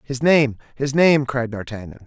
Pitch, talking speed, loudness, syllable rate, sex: 130 Hz, 175 wpm, -19 LUFS, 4.7 syllables/s, male